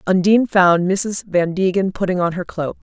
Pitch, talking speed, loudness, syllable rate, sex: 185 Hz, 185 wpm, -17 LUFS, 4.9 syllables/s, female